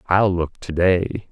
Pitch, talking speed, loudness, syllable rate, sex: 90 Hz, 135 wpm, -20 LUFS, 3.6 syllables/s, male